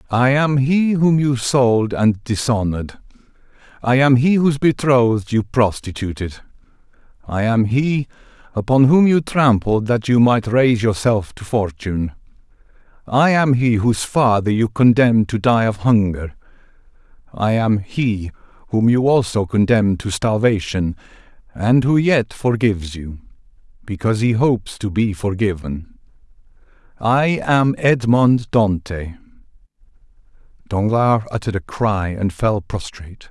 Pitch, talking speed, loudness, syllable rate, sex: 115 Hz, 120 wpm, -17 LUFS, 4.4 syllables/s, male